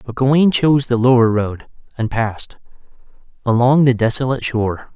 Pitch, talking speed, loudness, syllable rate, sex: 125 Hz, 145 wpm, -16 LUFS, 6.0 syllables/s, male